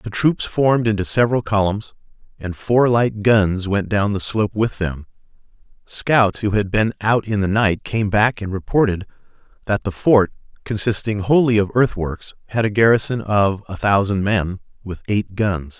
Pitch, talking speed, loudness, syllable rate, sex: 105 Hz, 170 wpm, -19 LUFS, 4.6 syllables/s, male